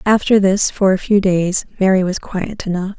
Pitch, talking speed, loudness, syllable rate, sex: 195 Hz, 200 wpm, -16 LUFS, 4.8 syllables/s, female